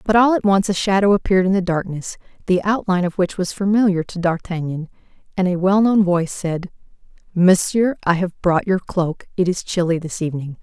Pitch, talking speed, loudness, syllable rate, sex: 185 Hz, 190 wpm, -19 LUFS, 5.6 syllables/s, female